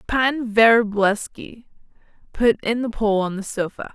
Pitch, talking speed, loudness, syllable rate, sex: 220 Hz, 135 wpm, -20 LUFS, 3.9 syllables/s, female